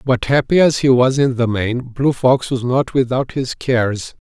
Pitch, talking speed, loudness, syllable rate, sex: 130 Hz, 210 wpm, -16 LUFS, 4.4 syllables/s, male